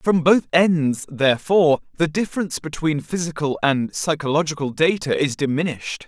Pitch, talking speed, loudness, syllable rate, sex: 155 Hz, 130 wpm, -20 LUFS, 5.2 syllables/s, male